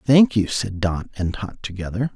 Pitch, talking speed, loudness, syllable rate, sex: 105 Hz, 195 wpm, -22 LUFS, 4.7 syllables/s, male